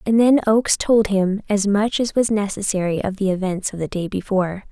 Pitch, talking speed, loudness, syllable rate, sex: 200 Hz, 215 wpm, -19 LUFS, 5.4 syllables/s, female